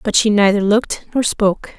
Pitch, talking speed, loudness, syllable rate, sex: 210 Hz, 200 wpm, -16 LUFS, 5.7 syllables/s, female